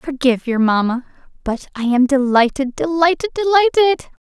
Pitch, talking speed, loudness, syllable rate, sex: 285 Hz, 125 wpm, -16 LUFS, 5.6 syllables/s, female